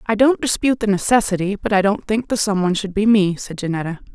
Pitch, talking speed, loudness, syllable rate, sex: 205 Hz, 245 wpm, -18 LUFS, 6.4 syllables/s, female